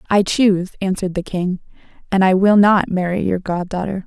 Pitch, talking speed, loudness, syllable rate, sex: 190 Hz, 175 wpm, -17 LUFS, 5.6 syllables/s, female